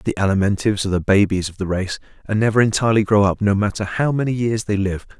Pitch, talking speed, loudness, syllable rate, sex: 105 Hz, 230 wpm, -19 LUFS, 6.8 syllables/s, male